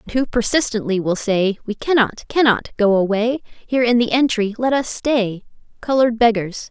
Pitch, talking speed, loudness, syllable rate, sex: 230 Hz, 170 wpm, -18 LUFS, 5.1 syllables/s, female